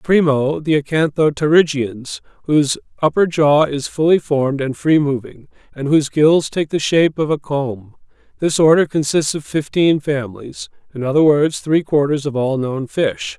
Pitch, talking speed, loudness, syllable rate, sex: 145 Hz, 160 wpm, -16 LUFS, 4.7 syllables/s, male